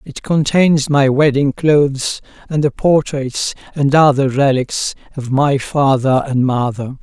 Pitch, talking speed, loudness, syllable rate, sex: 140 Hz, 135 wpm, -15 LUFS, 3.9 syllables/s, male